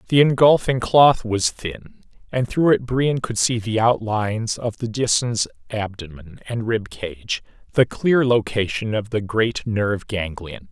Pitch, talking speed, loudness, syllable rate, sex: 110 Hz, 155 wpm, -20 LUFS, 4.2 syllables/s, male